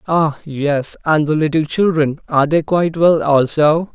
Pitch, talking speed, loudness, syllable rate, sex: 155 Hz, 165 wpm, -15 LUFS, 4.5 syllables/s, male